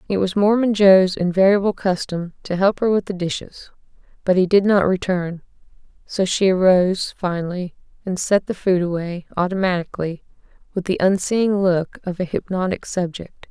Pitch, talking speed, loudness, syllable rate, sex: 185 Hz, 155 wpm, -19 LUFS, 5.1 syllables/s, female